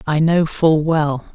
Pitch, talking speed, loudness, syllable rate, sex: 155 Hz, 180 wpm, -16 LUFS, 3.3 syllables/s, male